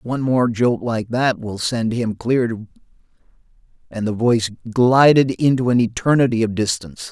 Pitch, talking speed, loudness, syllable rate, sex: 115 Hz, 160 wpm, -18 LUFS, 5.0 syllables/s, male